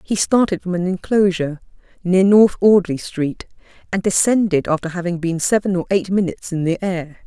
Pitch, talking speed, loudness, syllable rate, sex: 185 Hz, 175 wpm, -18 LUFS, 5.4 syllables/s, female